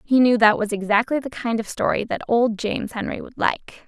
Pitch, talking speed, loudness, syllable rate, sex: 230 Hz, 230 wpm, -21 LUFS, 5.4 syllables/s, female